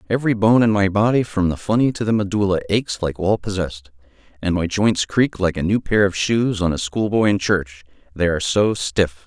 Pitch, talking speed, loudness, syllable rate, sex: 100 Hz, 225 wpm, -19 LUFS, 5.5 syllables/s, male